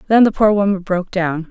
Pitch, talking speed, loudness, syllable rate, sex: 195 Hz, 240 wpm, -16 LUFS, 6.1 syllables/s, female